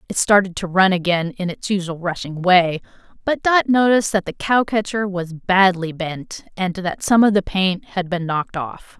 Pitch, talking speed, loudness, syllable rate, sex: 190 Hz, 200 wpm, -19 LUFS, 4.7 syllables/s, female